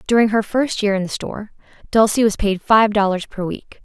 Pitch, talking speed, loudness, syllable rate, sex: 210 Hz, 220 wpm, -18 LUFS, 5.4 syllables/s, female